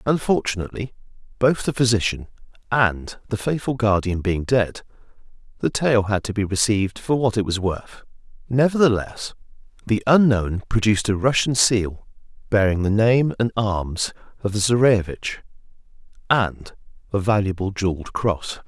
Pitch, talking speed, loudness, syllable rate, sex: 110 Hz, 130 wpm, -21 LUFS, 4.9 syllables/s, male